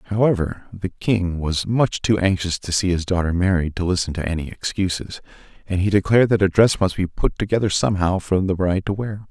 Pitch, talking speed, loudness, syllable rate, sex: 95 Hz, 215 wpm, -20 LUFS, 5.7 syllables/s, male